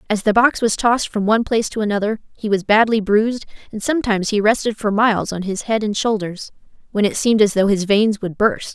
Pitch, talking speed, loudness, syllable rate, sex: 210 Hz, 235 wpm, -18 LUFS, 6.2 syllables/s, female